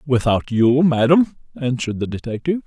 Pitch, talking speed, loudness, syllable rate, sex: 135 Hz, 135 wpm, -18 LUFS, 5.8 syllables/s, male